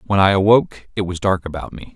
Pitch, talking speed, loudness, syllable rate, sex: 95 Hz, 245 wpm, -17 LUFS, 6.2 syllables/s, male